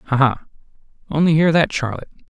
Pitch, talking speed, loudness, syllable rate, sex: 145 Hz, 155 wpm, -18 LUFS, 6.2 syllables/s, male